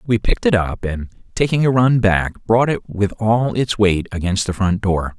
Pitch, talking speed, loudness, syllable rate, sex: 105 Hz, 220 wpm, -18 LUFS, 4.6 syllables/s, male